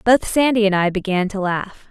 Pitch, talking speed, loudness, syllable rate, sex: 200 Hz, 220 wpm, -18 LUFS, 5.1 syllables/s, female